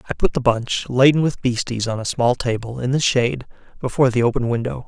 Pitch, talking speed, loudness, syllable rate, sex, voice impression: 125 Hz, 220 wpm, -19 LUFS, 5.9 syllables/s, male, very masculine, adult-like, thick, slightly tensed, slightly weak, bright, slightly soft, muffled, fluent, slightly raspy, cool, slightly intellectual, refreshing, sincere, calm, slightly mature, slightly friendly, slightly reassuring, slightly unique, slightly elegant, slightly wild, slightly sweet, lively, kind, modest